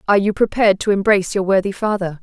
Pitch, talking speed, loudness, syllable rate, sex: 200 Hz, 215 wpm, -17 LUFS, 7.3 syllables/s, female